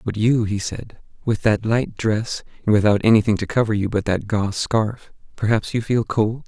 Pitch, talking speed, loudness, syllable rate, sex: 110 Hz, 205 wpm, -20 LUFS, 4.9 syllables/s, male